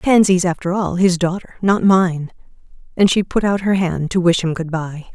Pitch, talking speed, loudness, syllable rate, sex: 180 Hz, 185 wpm, -17 LUFS, 4.8 syllables/s, female